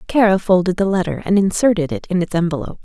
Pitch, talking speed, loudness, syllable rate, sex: 190 Hz, 210 wpm, -17 LUFS, 6.9 syllables/s, female